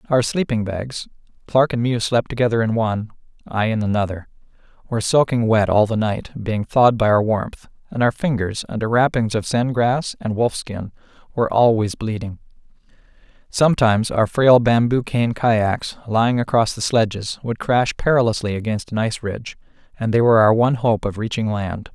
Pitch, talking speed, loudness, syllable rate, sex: 115 Hz, 170 wpm, -19 LUFS, 4.7 syllables/s, male